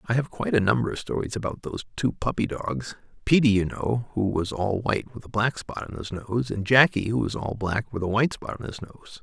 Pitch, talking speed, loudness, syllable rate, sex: 110 Hz, 255 wpm, -25 LUFS, 5.7 syllables/s, male